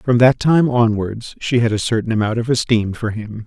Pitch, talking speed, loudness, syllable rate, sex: 115 Hz, 225 wpm, -17 LUFS, 5.0 syllables/s, male